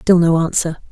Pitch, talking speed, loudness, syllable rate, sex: 170 Hz, 195 wpm, -15 LUFS, 5.0 syllables/s, female